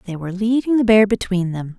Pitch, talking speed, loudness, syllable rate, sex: 200 Hz, 235 wpm, -18 LUFS, 6.1 syllables/s, female